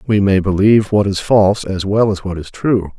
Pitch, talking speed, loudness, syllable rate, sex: 100 Hz, 240 wpm, -15 LUFS, 5.4 syllables/s, male